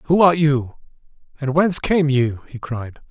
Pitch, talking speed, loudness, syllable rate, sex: 145 Hz, 175 wpm, -19 LUFS, 4.8 syllables/s, male